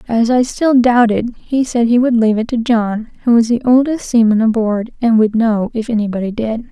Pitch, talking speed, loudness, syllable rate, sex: 230 Hz, 215 wpm, -14 LUFS, 5.2 syllables/s, female